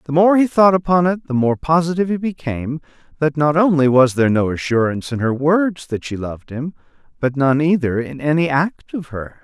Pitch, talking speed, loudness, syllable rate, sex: 150 Hz, 210 wpm, -17 LUFS, 5.6 syllables/s, male